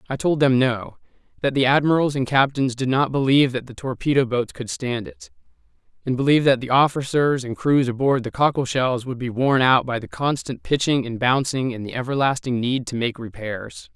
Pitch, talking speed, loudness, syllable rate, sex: 130 Hz, 200 wpm, -21 LUFS, 5.3 syllables/s, male